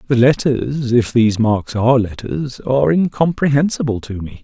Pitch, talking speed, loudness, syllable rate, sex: 125 Hz, 120 wpm, -16 LUFS, 5.0 syllables/s, male